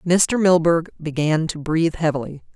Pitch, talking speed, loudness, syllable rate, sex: 160 Hz, 140 wpm, -19 LUFS, 5.0 syllables/s, female